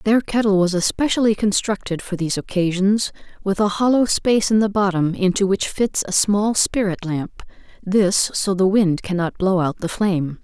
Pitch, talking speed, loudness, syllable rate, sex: 195 Hz, 175 wpm, -19 LUFS, 4.9 syllables/s, female